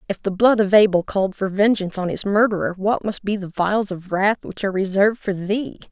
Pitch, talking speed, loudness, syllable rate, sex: 200 Hz, 235 wpm, -20 LUFS, 5.8 syllables/s, female